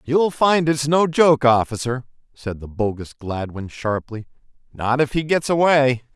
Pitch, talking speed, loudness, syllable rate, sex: 130 Hz, 145 wpm, -19 LUFS, 4.3 syllables/s, male